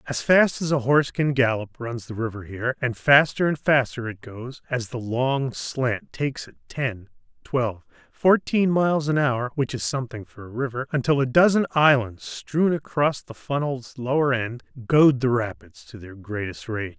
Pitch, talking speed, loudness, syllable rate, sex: 130 Hz, 185 wpm, -23 LUFS, 4.4 syllables/s, male